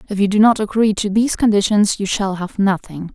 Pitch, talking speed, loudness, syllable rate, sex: 200 Hz, 230 wpm, -16 LUFS, 5.7 syllables/s, female